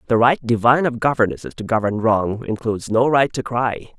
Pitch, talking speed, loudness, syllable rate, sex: 115 Hz, 195 wpm, -19 LUFS, 5.7 syllables/s, male